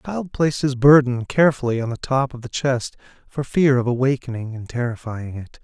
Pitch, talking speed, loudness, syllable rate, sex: 130 Hz, 200 wpm, -20 LUFS, 5.5 syllables/s, male